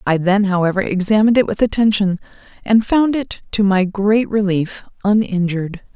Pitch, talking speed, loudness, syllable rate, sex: 200 Hz, 150 wpm, -16 LUFS, 5.2 syllables/s, female